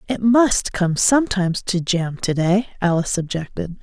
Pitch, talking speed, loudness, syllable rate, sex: 190 Hz, 155 wpm, -19 LUFS, 4.9 syllables/s, female